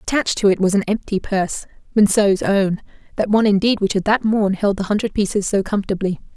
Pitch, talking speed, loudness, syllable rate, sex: 200 Hz, 200 wpm, -18 LUFS, 6.3 syllables/s, female